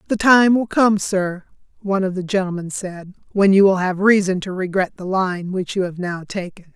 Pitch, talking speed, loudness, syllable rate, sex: 190 Hz, 215 wpm, -18 LUFS, 5.1 syllables/s, female